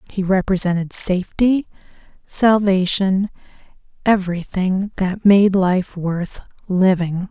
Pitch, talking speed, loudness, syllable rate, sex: 190 Hz, 80 wpm, -18 LUFS, 3.8 syllables/s, female